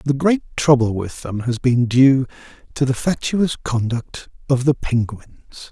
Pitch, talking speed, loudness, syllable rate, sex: 130 Hz, 160 wpm, -19 LUFS, 4.2 syllables/s, male